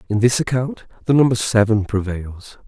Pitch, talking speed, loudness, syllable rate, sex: 110 Hz, 155 wpm, -18 LUFS, 4.9 syllables/s, male